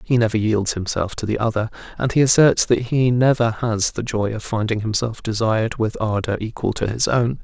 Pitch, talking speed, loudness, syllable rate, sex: 110 Hz, 210 wpm, -20 LUFS, 5.3 syllables/s, male